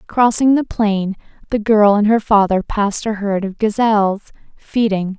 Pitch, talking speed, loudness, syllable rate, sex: 210 Hz, 160 wpm, -16 LUFS, 4.6 syllables/s, female